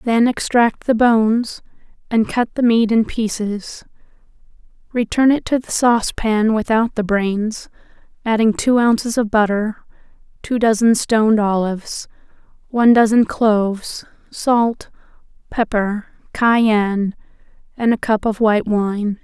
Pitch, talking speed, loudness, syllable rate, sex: 220 Hz, 120 wpm, -17 LUFS, 4.2 syllables/s, female